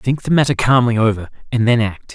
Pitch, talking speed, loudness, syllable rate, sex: 120 Hz, 225 wpm, -16 LUFS, 5.6 syllables/s, male